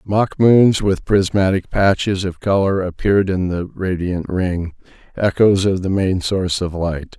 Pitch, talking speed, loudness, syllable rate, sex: 95 Hz, 160 wpm, -17 LUFS, 4.2 syllables/s, male